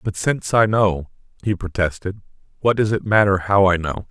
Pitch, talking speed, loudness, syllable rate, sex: 100 Hz, 190 wpm, -19 LUFS, 5.4 syllables/s, male